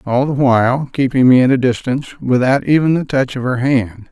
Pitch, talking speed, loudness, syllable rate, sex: 130 Hz, 220 wpm, -14 LUFS, 5.3 syllables/s, male